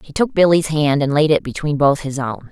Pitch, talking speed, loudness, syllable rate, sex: 150 Hz, 265 wpm, -17 LUFS, 5.4 syllables/s, female